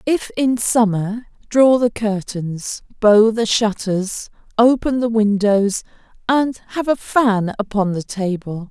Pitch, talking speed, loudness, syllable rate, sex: 220 Hz, 130 wpm, -18 LUFS, 3.6 syllables/s, female